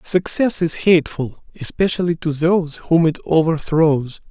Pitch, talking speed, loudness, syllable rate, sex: 165 Hz, 125 wpm, -18 LUFS, 4.6 syllables/s, male